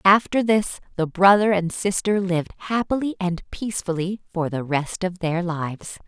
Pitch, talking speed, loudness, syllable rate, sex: 185 Hz, 160 wpm, -22 LUFS, 4.8 syllables/s, female